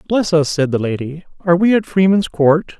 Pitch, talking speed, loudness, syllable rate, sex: 170 Hz, 195 wpm, -15 LUFS, 5.3 syllables/s, male